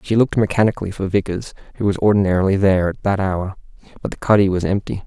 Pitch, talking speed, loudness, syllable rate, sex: 100 Hz, 200 wpm, -18 LUFS, 7.0 syllables/s, male